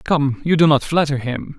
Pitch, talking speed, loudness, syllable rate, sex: 145 Hz, 225 wpm, -17 LUFS, 4.8 syllables/s, male